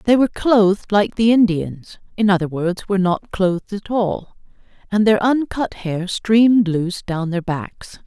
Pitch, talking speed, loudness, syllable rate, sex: 200 Hz, 155 wpm, -18 LUFS, 4.5 syllables/s, female